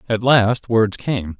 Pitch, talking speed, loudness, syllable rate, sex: 110 Hz, 170 wpm, -17 LUFS, 3.3 syllables/s, male